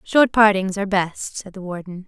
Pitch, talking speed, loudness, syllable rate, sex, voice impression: 195 Hz, 200 wpm, -19 LUFS, 5.1 syllables/s, female, feminine, slightly young, slightly thin, tensed, bright, soft, slightly intellectual, slightly refreshing, friendly, unique, elegant, lively, slightly intense